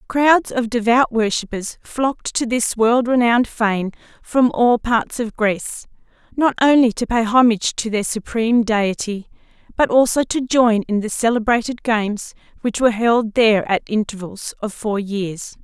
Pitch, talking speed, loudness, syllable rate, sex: 225 Hz, 155 wpm, -18 LUFS, 4.6 syllables/s, female